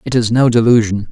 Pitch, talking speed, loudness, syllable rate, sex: 115 Hz, 215 wpm, -12 LUFS, 5.9 syllables/s, male